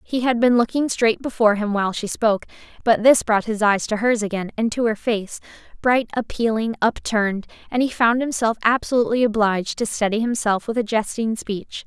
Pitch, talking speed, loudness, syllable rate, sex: 225 Hz, 180 wpm, -20 LUFS, 5.5 syllables/s, female